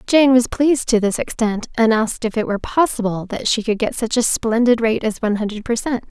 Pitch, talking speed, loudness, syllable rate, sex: 230 Hz, 245 wpm, -18 LUFS, 5.9 syllables/s, female